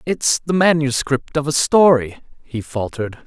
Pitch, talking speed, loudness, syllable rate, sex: 140 Hz, 145 wpm, -17 LUFS, 4.5 syllables/s, male